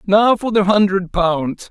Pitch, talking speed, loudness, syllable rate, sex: 195 Hz, 175 wpm, -16 LUFS, 3.7 syllables/s, male